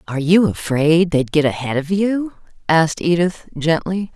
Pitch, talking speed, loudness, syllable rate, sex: 165 Hz, 160 wpm, -17 LUFS, 4.7 syllables/s, female